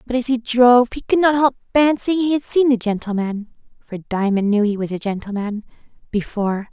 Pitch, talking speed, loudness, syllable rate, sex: 230 Hz, 180 wpm, -18 LUFS, 5.6 syllables/s, female